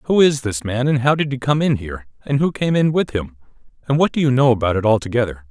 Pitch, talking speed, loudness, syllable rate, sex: 125 Hz, 270 wpm, -18 LUFS, 6.3 syllables/s, male